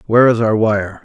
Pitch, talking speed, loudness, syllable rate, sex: 110 Hz, 230 wpm, -14 LUFS, 5.6 syllables/s, male